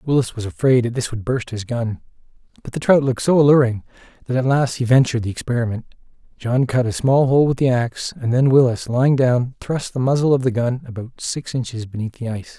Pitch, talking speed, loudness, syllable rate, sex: 125 Hz, 225 wpm, -19 LUFS, 6.1 syllables/s, male